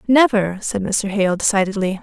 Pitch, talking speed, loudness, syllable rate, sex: 205 Hz, 150 wpm, -18 LUFS, 4.9 syllables/s, female